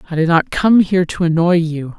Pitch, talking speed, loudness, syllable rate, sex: 170 Hz, 240 wpm, -15 LUFS, 5.6 syllables/s, female